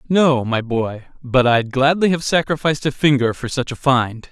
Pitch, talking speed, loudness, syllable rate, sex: 135 Hz, 195 wpm, -18 LUFS, 4.9 syllables/s, male